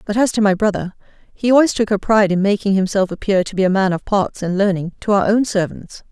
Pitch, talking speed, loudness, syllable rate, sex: 200 Hz, 255 wpm, -17 LUFS, 6.1 syllables/s, female